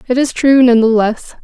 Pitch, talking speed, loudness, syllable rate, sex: 245 Hz, 250 wpm, -11 LUFS, 4.8 syllables/s, female